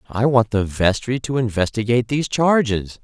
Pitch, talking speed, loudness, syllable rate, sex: 115 Hz, 160 wpm, -19 LUFS, 5.3 syllables/s, male